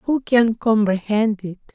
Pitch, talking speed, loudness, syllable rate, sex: 220 Hz, 140 wpm, -19 LUFS, 3.8 syllables/s, female